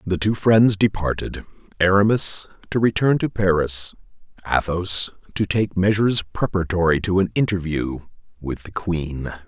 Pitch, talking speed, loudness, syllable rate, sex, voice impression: 95 Hz, 120 wpm, -20 LUFS, 4.7 syllables/s, male, very masculine, very adult-like, thick, cool, sincere, slightly friendly, slightly elegant